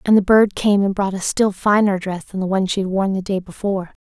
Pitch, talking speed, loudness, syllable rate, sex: 195 Hz, 285 wpm, -18 LUFS, 5.9 syllables/s, female